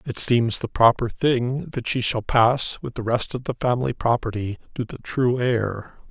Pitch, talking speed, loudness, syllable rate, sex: 120 Hz, 195 wpm, -22 LUFS, 4.5 syllables/s, male